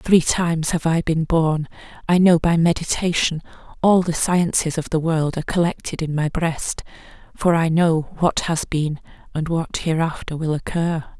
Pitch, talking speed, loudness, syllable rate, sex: 165 Hz, 170 wpm, -20 LUFS, 4.6 syllables/s, female